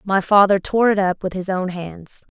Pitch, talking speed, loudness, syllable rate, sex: 190 Hz, 230 wpm, -18 LUFS, 4.6 syllables/s, female